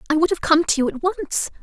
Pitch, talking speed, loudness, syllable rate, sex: 320 Hz, 295 wpm, -20 LUFS, 6.1 syllables/s, female